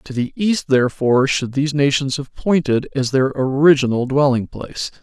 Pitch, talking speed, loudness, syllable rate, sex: 135 Hz, 165 wpm, -17 LUFS, 5.2 syllables/s, male